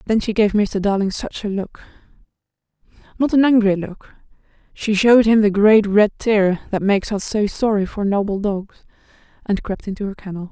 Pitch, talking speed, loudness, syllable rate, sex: 205 Hz, 185 wpm, -18 LUFS, 5.3 syllables/s, female